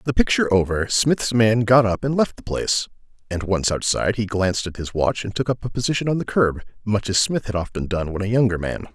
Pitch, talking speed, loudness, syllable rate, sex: 110 Hz, 250 wpm, -21 LUFS, 6.0 syllables/s, male